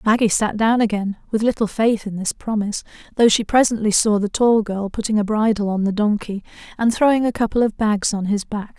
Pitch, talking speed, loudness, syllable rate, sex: 215 Hz, 220 wpm, -19 LUFS, 5.6 syllables/s, female